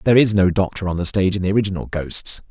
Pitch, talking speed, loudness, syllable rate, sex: 95 Hz, 265 wpm, -19 LUFS, 7.3 syllables/s, male